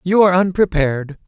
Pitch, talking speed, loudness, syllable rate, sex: 175 Hz, 140 wpm, -16 LUFS, 6.3 syllables/s, male